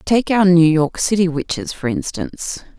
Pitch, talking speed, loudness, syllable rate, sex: 180 Hz, 170 wpm, -17 LUFS, 4.7 syllables/s, female